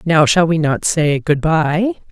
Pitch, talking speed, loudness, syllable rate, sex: 160 Hz, 200 wpm, -15 LUFS, 3.8 syllables/s, female